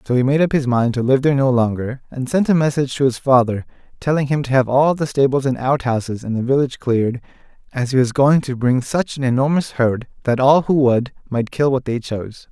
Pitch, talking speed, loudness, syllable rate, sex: 130 Hz, 240 wpm, -18 LUFS, 5.8 syllables/s, male